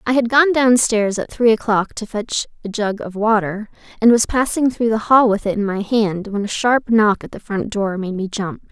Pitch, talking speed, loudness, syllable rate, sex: 220 Hz, 250 wpm, -17 LUFS, 4.8 syllables/s, female